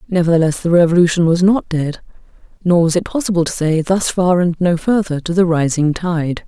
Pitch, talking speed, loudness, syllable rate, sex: 170 Hz, 195 wpm, -15 LUFS, 5.5 syllables/s, female